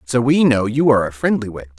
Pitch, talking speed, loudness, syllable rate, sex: 115 Hz, 270 wpm, -16 LUFS, 6.3 syllables/s, male